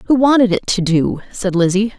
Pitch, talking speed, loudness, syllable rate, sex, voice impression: 205 Hz, 210 wpm, -15 LUFS, 5.4 syllables/s, female, feminine, adult-like, fluent, slightly cool, calm, slightly elegant, slightly sweet